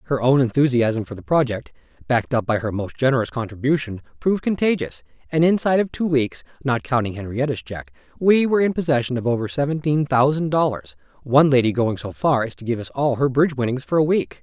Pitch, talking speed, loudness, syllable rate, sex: 130 Hz, 205 wpm, -20 LUFS, 6.1 syllables/s, male